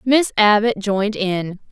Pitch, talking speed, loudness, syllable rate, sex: 210 Hz, 140 wpm, -17 LUFS, 4.1 syllables/s, female